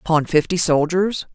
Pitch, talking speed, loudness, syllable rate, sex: 170 Hz, 135 wpm, -18 LUFS, 5.0 syllables/s, female